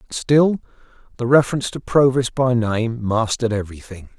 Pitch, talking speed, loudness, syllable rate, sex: 120 Hz, 130 wpm, -19 LUFS, 5.5 syllables/s, male